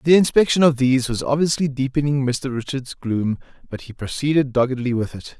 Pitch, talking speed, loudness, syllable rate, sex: 135 Hz, 180 wpm, -20 LUFS, 5.6 syllables/s, male